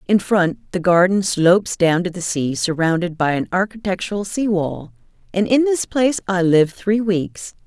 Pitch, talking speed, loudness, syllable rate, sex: 185 Hz, 180 wpm, -18 LUFS, 4.9 syllables/s, female